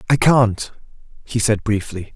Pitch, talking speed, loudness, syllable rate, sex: 115 Hz, 140 wpm, -18 LUFS, 4.0 syllables/s, male